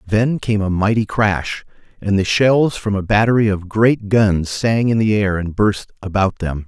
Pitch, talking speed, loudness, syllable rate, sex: 105 Hz, 200 wpm, -17 LUFS, 4.3 syllables/s, male